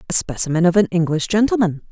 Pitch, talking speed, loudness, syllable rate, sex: 180 Hz, 190 wpm, -17 LUFS, 6.6 syllables/s, female